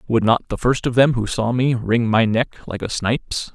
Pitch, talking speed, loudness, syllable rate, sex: 120 Hz, 255 wpm, -19 LUFS, 4.7 syllables/s, male